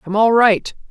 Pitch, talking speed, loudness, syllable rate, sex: 210 Hz, 200 wpm, -14 LUFS, 4.5 syllables/s, female